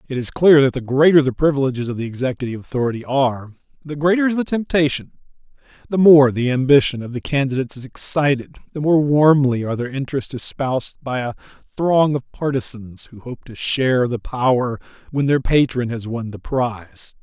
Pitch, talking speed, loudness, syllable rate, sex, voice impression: 135 Hz, 180 wpm, -18 LUFS, 5.8 syllables/s, male, very masculine, slightly old, thick, tensed, slightly powerful, bright, soft, clear, fluent, slightly raspy, cool, intellectual, refreshing, sincere, very calm, very mature, friendly, reassuring, unique, elegant, slightly wild, sweet, very lively, slightly kind, intense